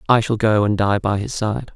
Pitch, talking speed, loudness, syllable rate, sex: 105 Hz, 275 wpm, -19 LUFS, 5.1 syllables/s, male